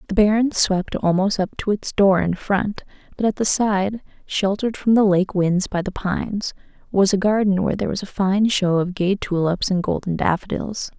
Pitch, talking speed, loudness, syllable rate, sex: 195 Hz, 200 wpm, -20 LUFS, 5.0 syllables/s, female